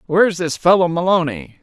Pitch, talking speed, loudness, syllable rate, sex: 170 Hz, 150 wpm, -16 LUFS, 5.6 syllables/s, male